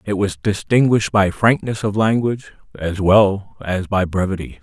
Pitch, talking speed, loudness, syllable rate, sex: 100 Hz, 155 wpm, -18 LUFS, 4.8 syllables/s, male